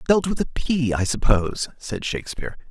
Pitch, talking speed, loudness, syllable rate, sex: 130 Hz, 180 wpm, -24 LUFS, 5.5 syllables/s, male